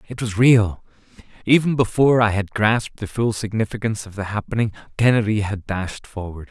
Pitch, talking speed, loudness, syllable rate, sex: 110 Hz, 165 wpm, -20 LUFS, 5.6 syllables/s, male